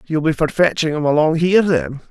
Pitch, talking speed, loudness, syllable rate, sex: 155 Hz, 230 wpm, -16 LUFS, 5.9 syllables/s, male